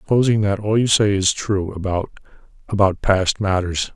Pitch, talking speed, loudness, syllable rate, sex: 100 Hz, 150 wpm, -19 LUFS, 5.0 syllables/s, male